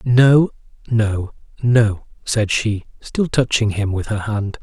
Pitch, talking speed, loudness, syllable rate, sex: 110 Hz, 145 wpm, -18 LUFS, 3.4 syllables/s, male